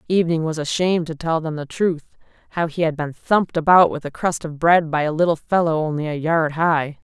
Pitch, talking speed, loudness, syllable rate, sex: 160 Hz, 220 wpm, -20 LUFS, 5.6 syllables/s, female